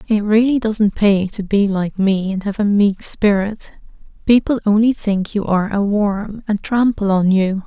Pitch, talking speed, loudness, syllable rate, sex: 205 Hz, 190 wpm, -17 LUFS, 4.4 syllables/s, female